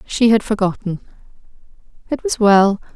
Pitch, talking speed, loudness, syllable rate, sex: 210 Hz, 120 wpm, -16 LUFS, 4.9 syllables/s, female